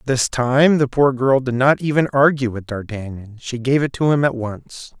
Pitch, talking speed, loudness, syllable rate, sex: 125 Hz, 215 wpm, -18 LUFS, 4.7 syllables/s, male